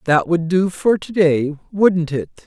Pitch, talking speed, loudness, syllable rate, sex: 170 Hz, 195 wpm, -18 LUFS, 3.9 syllables/s, male